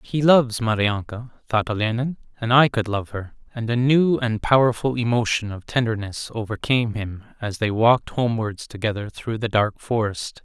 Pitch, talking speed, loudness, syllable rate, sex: 115 Hz, 165 wpm, -22 LUFS, 5.1 syllables/s, male